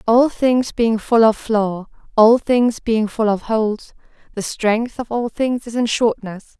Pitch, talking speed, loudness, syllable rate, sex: 225 Hz, 180 wpm, -18 LUFS, 3.8 syllables/s, female